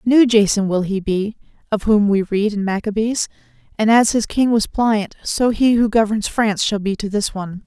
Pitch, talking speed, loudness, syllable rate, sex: 215 Hz, 210 wpm, -18 LUFS, 5.0 syllables/s, female